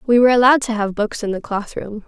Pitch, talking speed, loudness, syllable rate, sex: 225 Hz, 290 wpm, -17 LUFS, 6.7 syllables/s, female